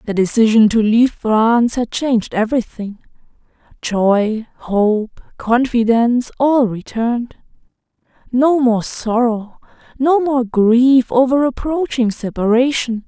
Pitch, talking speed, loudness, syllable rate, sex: 240 Hz, 100 wpm, -15 LUFS, 4.0 syllables/s, female